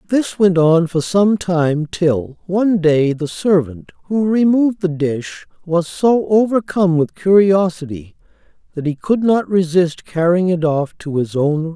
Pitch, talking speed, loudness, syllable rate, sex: 175 Hz, 165 wpm, -16 LUFS, 4.2 syllables/s, male